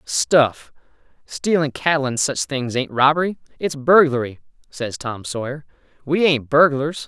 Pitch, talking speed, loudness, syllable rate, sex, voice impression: 140 Hz, 135 wpm, -19 LUFS, 4.4 syllables/s, male, masculine, adult-like, tensed, powerful, clear, fluent, cool, intellectual, friendly, slightly wild, lively, slightly light